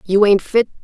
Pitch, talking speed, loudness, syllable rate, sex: 205 Hz, 215 wpm, -15 LUFS, 4.9 syllables/s, female